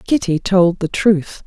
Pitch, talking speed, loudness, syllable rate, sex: 185 Hz, 165 wpm, -16 LUFS, 3.8 syllables/s, female